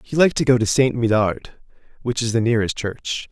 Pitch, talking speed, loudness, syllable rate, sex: 115 Hz, 215 wpm, -19 LUFS, 5.7 syllables/s, male